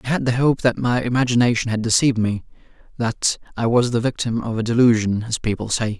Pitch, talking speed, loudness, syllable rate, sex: 115 Hz, 200 wpm, -20 LUFS, 6.0 syllables/s, male